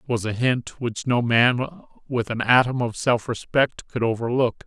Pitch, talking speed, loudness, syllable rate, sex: 120 Hz, 195 wpm, -22 LUFS, 4.7 syllables/s, male